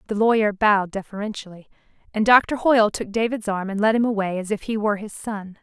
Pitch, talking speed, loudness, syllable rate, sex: 210 Hz, 215 wpm, -21 LUFS, 6.3 syllables/s, female